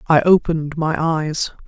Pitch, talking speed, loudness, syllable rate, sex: 160 Hz, 145 wpm, -18 LUFS, 4.5 syllables/s, female